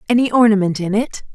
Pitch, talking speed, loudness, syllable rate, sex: 215 Hz, 180 wpm, -16 LUFS, 6.4 syllables/s, female